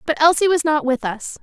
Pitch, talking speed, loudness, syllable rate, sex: 295 Hz, 255 wpm, -18 LUFS, 5.4 syllables/s, female